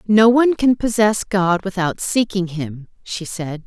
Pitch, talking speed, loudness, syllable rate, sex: 195 Hz, 165 wpm, -18 LUFS, 4.1 syllables/s, female